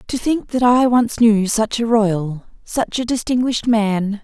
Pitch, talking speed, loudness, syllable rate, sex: 225 Hz, 185 wpm, -17 LUFS, 4.1 syllables/s, female